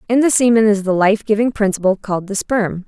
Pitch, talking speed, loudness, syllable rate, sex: 210 Hz, 230 wpm, -16 LUFS, 6.0 syllables/s, female